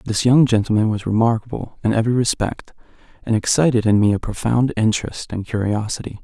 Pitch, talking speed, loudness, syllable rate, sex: 115 Hz, 165 wpm, -19 LUFS, 5.8 syllables/s, male